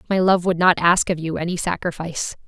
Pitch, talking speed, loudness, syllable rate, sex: 175 Hz, 220 wpm, -20 LUFS, 6.0 syllables/s, female